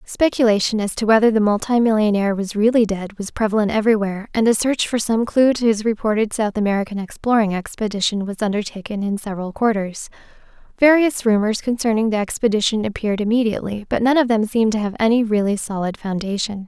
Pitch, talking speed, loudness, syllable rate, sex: 215 Hz, 175 wpm, -19 LUFS, 6.3 syllables/s, female